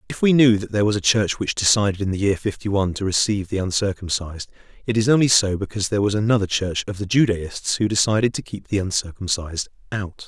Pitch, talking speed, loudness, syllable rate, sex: 100 Hz, 210 wpm, -20 LUFS, 6.6 syllables/s, male